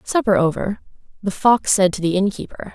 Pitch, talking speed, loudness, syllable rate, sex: 200 Hz, 175 wpm, -18 LUFS, 5.3 syllables/s, female